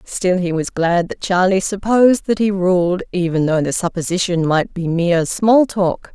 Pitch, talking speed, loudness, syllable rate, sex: 185 Hz, 185 wpm, -17 LUFS, 4.5 syllables/s, female